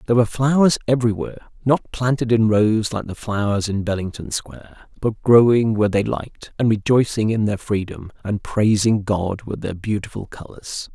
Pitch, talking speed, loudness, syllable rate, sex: 110 Hz, 170 wpm, -20 LUFS, 5.4 syllables/s, male